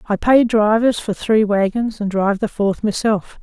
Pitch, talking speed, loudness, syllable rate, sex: 210 Hz, 195 wpm, -17 LUFS, 4.6 syllables/s, female